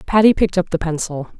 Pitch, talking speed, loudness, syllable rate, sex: 180 Hz, 215 wpm, -18 LUFS, 6.7 syllables/s, female